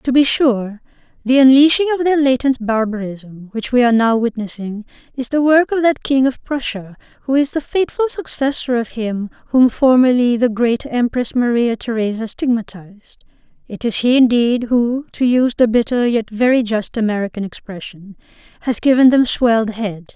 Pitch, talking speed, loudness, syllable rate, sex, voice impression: 240 Hz, 165 wpm, -16 LUFS, 5.1 syllables/s, female, feminine, slightly young, tensed, powerful, slightly soft, clear, slightly cute, friendly, unique, lively, slightly intense